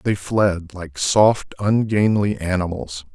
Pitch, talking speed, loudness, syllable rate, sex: 95 Hz, 115 wpm, -19 LUFS, 3.5 syllables/s, male